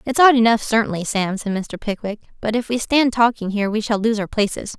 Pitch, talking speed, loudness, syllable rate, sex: 220 Hz, 240 wpm, -19 LUFS, 5.8 syllables/s, female